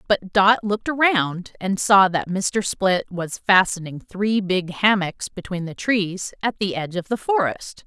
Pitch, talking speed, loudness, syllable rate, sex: 195 Hz, 175 wpm, -21 LUFS, 4.2 syllables/s, female